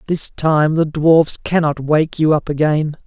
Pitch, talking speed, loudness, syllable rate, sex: 155 Hz, 175 wpm, -16 LUFS, 3.9 syllables/s, male